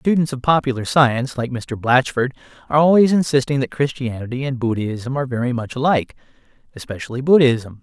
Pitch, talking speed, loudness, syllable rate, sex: 130 Hz, 155 wpm, -18 LUFS, 6.0 syllables/s, male